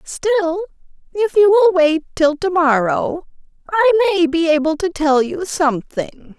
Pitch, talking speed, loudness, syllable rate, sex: 340 Hz, 150 wpm, -16 LUFS, 4.4 syllables/s, female